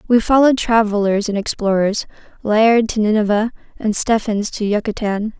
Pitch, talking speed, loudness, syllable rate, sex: 215 Hz, 120 wpm, -17 LUFS, 5.1 syllables/s, female